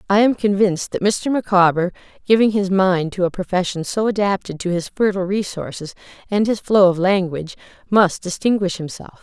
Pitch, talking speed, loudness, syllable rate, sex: 190 Hz, 170 wpm, -18 LUFS, 5.5 syllables/s, female